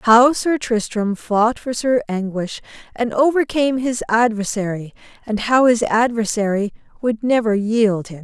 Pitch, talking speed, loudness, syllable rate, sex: 225 Hz, 140 wpm, -18 LUFS, 4.4 syllables/s, female